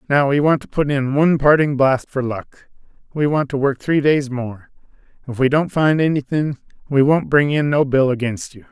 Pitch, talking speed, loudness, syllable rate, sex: 140 Hz, 215 wpm, -17 LUFS, 5.0 syllables/s, male